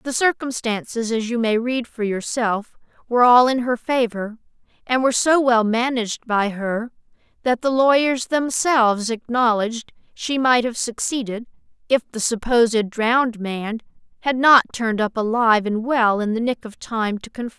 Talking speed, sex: 165 wpm, female